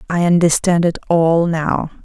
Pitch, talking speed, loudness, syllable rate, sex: 170 Hz, 145 wpm, -15 LUFS, 4.2 syllables/s, female